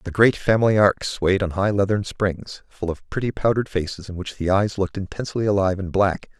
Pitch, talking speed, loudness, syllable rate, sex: 100 Hz, 215 wpm, -22 LUFS, 5.9 syllables/s, male